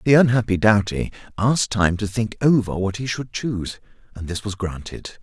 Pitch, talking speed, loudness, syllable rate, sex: 105 Hz, 185 wpm, -21 LUFS, 5.1 syllables/s, male